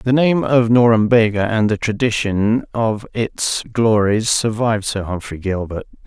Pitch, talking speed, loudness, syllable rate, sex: 110 Hz, 140 wpm, -17 LUFS, 4.3 syllables/s, male